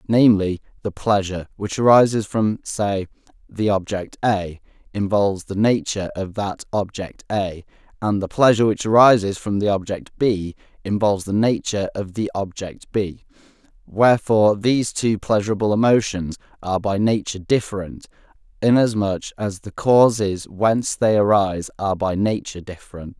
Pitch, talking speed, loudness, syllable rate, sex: 100 Hz, 135 wpm, -20 LUFS, 5.1 syllables/s, male